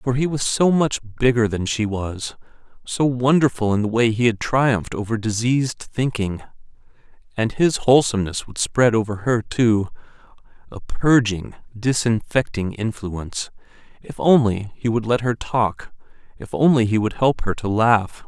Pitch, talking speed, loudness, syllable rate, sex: 115 Hz, 155 wpm, -20 LUFS, 4.6 syllables/s, male